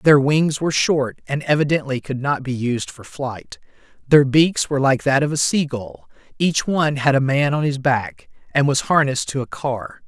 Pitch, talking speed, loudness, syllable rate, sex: 140 Hz, 210 wpm, -19 LUFS, 4.8 syllables/s, male